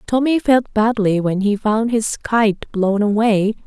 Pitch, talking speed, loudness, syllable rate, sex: 215 Hz, 165 wpm, -17 LUFS, 3.9 syllables/s, female